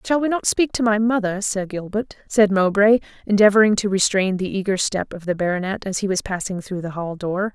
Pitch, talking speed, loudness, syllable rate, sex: 200 Hz, 225 wpm, -20 LUFS, 5.5 syllables/s, female